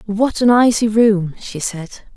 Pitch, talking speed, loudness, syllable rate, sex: 210 Hz, 165 wpm, -15 LUFS, 4.1 syllables/s, female